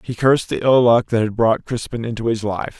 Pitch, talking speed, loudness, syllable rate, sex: 115 Hz, 255 wpm, -18 LUFS, 5.7 syllables/s, male